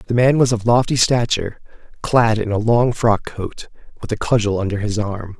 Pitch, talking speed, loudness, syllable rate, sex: 110 Hz, 200 wpm, -18 LUFS, 5.2 syllables/s, male